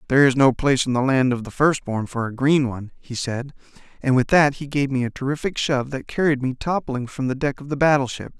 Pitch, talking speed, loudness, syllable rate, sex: 135 Hz, 255 wpm, -21 LUFS, 6.1 syllables/s, male